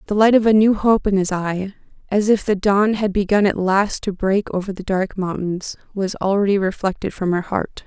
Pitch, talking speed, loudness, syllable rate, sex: 195 Hz, 220 wpm, -19 LUFS, 5.0 syllables/s, female